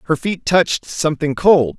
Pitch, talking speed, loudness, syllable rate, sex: 160 Hz, 170 wpm, -16 LUFS, 5.0 syllables/s, male